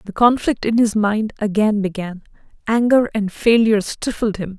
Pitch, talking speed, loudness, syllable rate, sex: 215 Hz, 155 wpm, -18 LUFS, 4.8 syllables/s, female